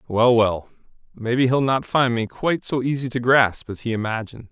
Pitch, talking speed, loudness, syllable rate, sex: 120 Hz, 200 wpm, -21 LUFS, 5.4 syllables/s, male